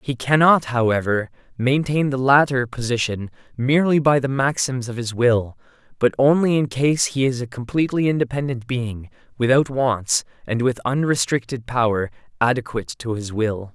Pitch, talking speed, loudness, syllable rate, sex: 125 Hz, 150 wpm, -20 LUFS, 5.0 syllables/s, male